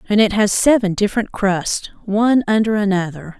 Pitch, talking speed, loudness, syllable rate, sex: 205 Hz, 160 wpm, -17 LUFS, 5.3 syllables/s, female